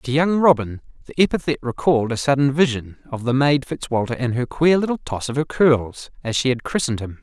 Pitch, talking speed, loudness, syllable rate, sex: 130 Hz, 215 wpm, -20 LUFS, 5.8 syllables/s, male